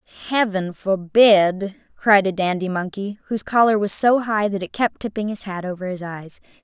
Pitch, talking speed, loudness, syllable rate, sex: 200 Hz, 180 wpm, -20 LUFS, 5.1 syllables/s, female